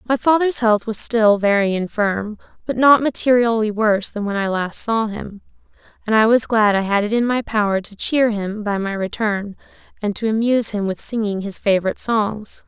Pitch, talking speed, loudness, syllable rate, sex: 215 Hz, 200 wpm, -18 LUFS, 5.1 syllables/s, female